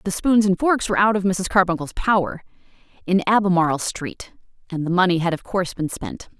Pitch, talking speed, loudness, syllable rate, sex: 185 Hz, 190 wpm, -20 LUFS, 5.9 syllables/s, female